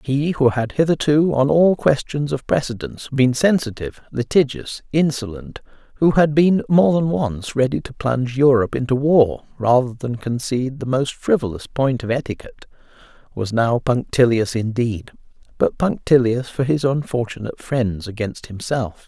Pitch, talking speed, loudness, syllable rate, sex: 130 Hz, 145 wpm, -19 LUFS, 4.9 syllables/s, male